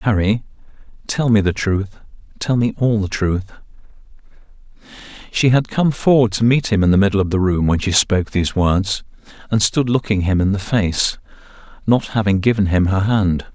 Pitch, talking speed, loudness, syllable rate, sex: 105 Hz, 180 wpm, -17 LUFS, 5.2 syllables/s, male